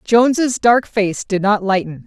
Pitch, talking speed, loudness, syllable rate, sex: 210 Hz, 175 wpm, -16 LUFS, 4.2 syllables/s, female